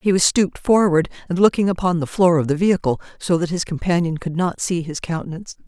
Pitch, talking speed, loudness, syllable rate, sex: 175 Hz, 220 wpm, -19 LUFS, 6.2 syllables/s, female